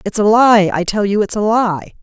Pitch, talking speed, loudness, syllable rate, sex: 205 Hz, 235 wpm, -14 LUFS, 4.9 syllables/s, female